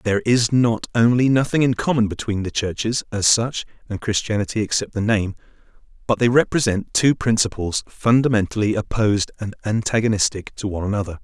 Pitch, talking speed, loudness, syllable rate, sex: 110 Hz, 155 wpm, -20 LUFS, 5.7 syllables/s, male